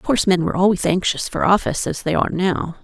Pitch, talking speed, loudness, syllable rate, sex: 185 Hz, 255 wpm, -19 LUFS, 7.0 syllables/s, female